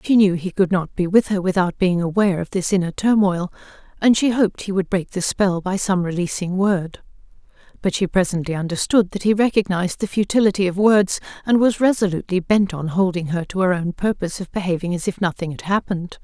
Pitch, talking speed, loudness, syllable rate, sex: 190 Hz, 205 wpm, -20 LUFS, 5.9 syllables/s, female